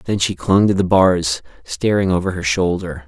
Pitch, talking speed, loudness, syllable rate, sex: 90 Hz, 195 wpm, -17 LUFS, 4.6 syllables/s, male